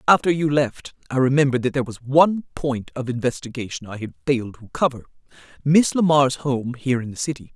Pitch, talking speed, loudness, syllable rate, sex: 135 Hz, 185 wpm, -21 LUFS, 6.1 syllables/s, female